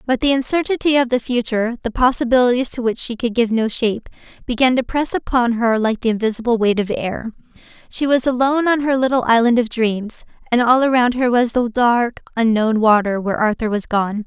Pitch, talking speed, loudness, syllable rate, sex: 240 Hz, 200 wpm, -17 LUFS, 5.7 syllables/s, female